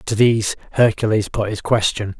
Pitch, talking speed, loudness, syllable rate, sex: 110 Hz, 165 wpm, -18 LUFS, 5.4 syllables/s, male